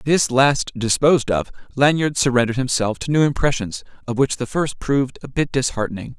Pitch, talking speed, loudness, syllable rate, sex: 130 Hz, 165 wpm, -19 LUFS, 5.6 syllables/s, male